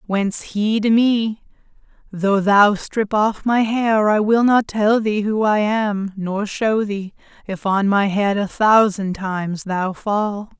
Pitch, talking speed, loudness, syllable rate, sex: 210 Hz, 170 wpm, -18 LUFS, 3.5 syllables/s, female